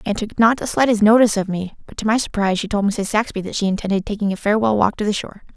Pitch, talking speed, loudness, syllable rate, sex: 210 Hz, 280 wpm, -19 LUFS, 7.3 syllables/s, female